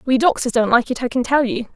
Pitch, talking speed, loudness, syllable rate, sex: 245 Hz, 305 wpm, -18 LUFS, 6.2 syllables/s, female